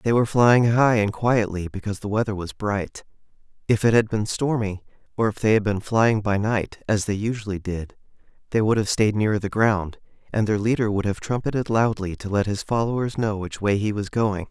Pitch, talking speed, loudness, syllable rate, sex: 105 Hz, 215 wpm, -22 LUFS, 5.3 syllables/s, male